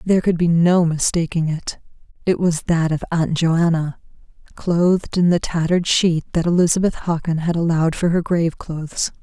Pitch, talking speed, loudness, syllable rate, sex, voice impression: 170 Hz, 165 wpm, -19 LUFS, 5.3 syllables/s, female, feminine, adult-like, slightly soft, slightly sincere, calm, slightly kind